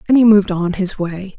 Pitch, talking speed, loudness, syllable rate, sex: 195 Hz, 260 wpm, -15 LUFS, 5.8 syllables/s, female